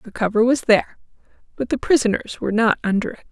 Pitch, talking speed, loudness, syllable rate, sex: 225 Hz, 200 wpm, -19 LUFS, 6.6 syllables/s, female